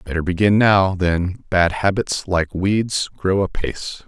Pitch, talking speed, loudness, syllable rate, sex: 95 Hz, 145 wpm, -19 LUFS, 4.0 syllables/s, male